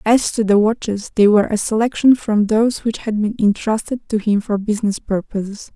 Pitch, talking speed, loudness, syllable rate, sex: 215 Hz, 200 wpm, -17 LUFS, 5.4 syllables/s, female